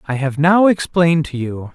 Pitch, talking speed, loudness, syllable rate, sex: 155 Hz, 205 wpm, -16 LUFS, 5.0 syllables/s, male